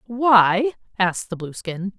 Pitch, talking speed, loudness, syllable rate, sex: 205 Hz, 120 wpm, -20 LUFS, 3.9 syllables/s, female